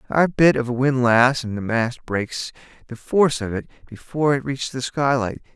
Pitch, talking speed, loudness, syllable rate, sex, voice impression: 130 Hz, 195 wpm, -20 LUFS, 5.2 syllables/s, male, very masculine, adult-like, thick, relaxed, slightly weak, dark, soft, clear, fluent, cool, very intellectual, refreshing, sincere, very calm, mature, friendly, reassuring, unique, elegant, slightly wild, sweet, slightly lively, very kind, slightly modest